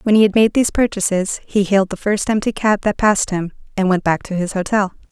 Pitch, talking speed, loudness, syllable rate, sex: 200 Hz, 245 wpm, -17 LUFS, 6.2 syllables/s, female